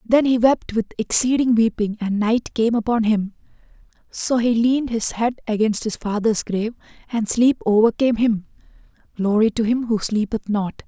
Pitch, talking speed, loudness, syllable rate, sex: 225 Hz, 165 wpm, -20 LUFS, 4.8 syllables/s, female